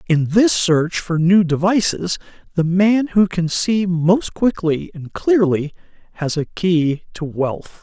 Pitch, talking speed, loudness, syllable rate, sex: 175 Hz, 155 wpm, -18 LUFS, 3.6 syllables/s, male